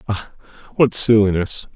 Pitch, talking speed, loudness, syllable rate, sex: 105 Hz, 105 wpm, -17 LUFS, 4.5 syllables/s, male